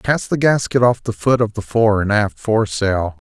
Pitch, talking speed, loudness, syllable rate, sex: 110 Hz, 220 wpm, -17 LUFS, 4.7 syllables/s, male